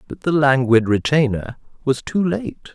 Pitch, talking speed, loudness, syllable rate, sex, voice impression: 140 Hz, 155 wpm, -18 LUFS, 4.6 syllables/s, male, very masculine, slightly middle-aged, thick, slightly relaxed, powerful, bright, soft, clear, fluent, cool, intellectual, slightly refreshing, sincere, calm, mature, friendly, reassuring, slightly unique, elegant, slightly wild, slightly sweet, lively, kind, slightly intense